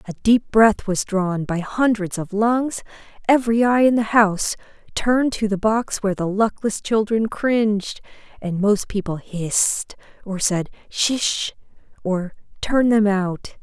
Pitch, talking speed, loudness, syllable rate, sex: 210 Hz, 150 wpm, -20 LUFS, 4.1 syllables/s, female